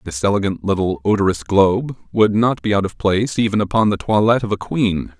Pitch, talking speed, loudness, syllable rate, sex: 100 Hz, 210 wpm, -18 LUFS, 5.9 syllables/s, male